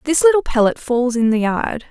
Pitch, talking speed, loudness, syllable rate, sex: 255 Hz, 220 wpm, -17 LUFS, 5.2 syllables/s, female